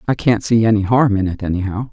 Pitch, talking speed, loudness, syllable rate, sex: 105 Hz, 250 wpm, -16 LUFS, 6.3 syllables/s, male